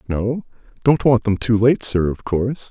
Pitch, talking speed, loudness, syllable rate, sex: 115 Hz, 180 wpm, -18 LUFS, 4.6 syllables/s, male